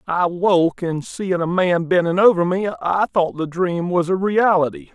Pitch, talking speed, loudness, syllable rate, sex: 175 Hz, 195 wpm, -19 LUFS, 4.3 syllables/s, male